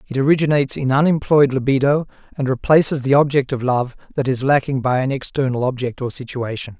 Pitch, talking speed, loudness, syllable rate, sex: 135 Hz, 175 wpm, -18 LUFS, 6.0 syllables/s, male